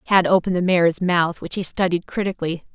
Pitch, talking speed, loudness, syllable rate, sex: 175 Hz, 195 wpm, -20 LUFS, 6.4 syllables/s, female